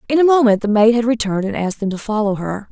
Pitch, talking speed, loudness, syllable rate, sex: 220 Hz, 285 wpm, -16 LUFS, 7.1 syllables/s, female